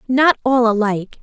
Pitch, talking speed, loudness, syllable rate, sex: 235 Hz, 145 wpm, -16 LUFS, 4.9 syllables/s, female